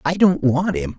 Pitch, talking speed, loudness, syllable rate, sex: 150 Hz, 245 wpm, -18 LUFS, 4.5 syllables/s, male